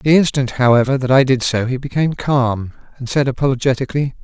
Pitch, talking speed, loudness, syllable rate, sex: 130 Hz, 185 wpm, -16 LUFS, 6.3 syllables/s, male